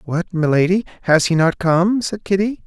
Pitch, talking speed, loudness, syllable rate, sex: 180 Hz, 180 wpm, -17 LUFS, 4.8 syllables/s, male